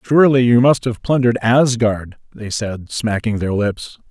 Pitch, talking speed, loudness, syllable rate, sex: 115 Hz, 160 wpm, -16 LUFS, 4.5 syllables/s, male